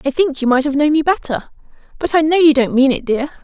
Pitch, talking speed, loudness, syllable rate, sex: 290 Hz, 280 wpm, -15 LUFS, 6.0 syllables/s, female